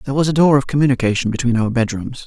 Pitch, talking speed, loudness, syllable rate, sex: 130 Hz, 240 wpm, -17 LUFS, 7.5 syllables/s, male